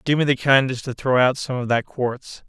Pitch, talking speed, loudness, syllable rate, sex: 130 Hz, 265 wpm, -20 LUFS, 5.1 syllables/s, male